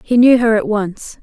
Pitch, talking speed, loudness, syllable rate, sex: 225 Hz, 245 wpm, -13 LUFS, 4.5 syllables/s, female